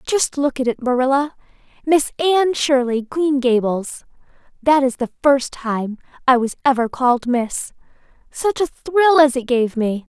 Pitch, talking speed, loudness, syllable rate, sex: 265 Hz, 160 wpm, -18 LUFS, 4.3 syllables/s, female